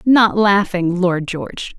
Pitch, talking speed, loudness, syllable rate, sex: 190 Hz, 135 wpm, -16 LUFS, 3.6 syllables/s, female